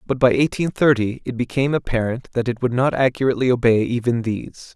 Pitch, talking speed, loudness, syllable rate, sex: 125 Hz, 190 wpm, -20 LUFS, 6.1 syllables/s, male